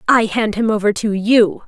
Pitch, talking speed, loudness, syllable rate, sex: 215 Hz, 215 wpm, -16 LUFS, 4.6 syllables/s, female